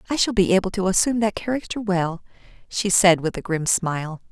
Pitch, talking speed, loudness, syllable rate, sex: 190 Hz, 210 wpm, -21 LUFS, 5.9 syllables/s, female